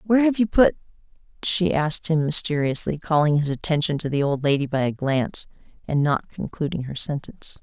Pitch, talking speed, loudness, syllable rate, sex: 155 Hz, 180 wpm, -22 LUFS, 5.7 syllables/s, female